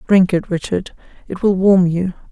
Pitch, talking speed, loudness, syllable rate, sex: 185 Hz, 180 wpm, -16 LUFS, 4.8 syllables/s, female